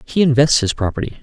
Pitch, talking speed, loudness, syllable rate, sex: 130 Hz, 195 wpm, -16 LUFS, 6.2 syllables/s, male